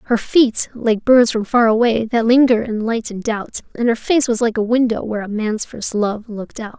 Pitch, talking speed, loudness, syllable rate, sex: 225 Hz, 240 wpm, -17 LUFS, 5.0 syllables/s, female